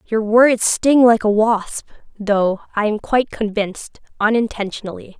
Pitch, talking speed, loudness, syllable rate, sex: 220 Hz, 140 wpm, -17 LUFS, 4.5 syllables/s, female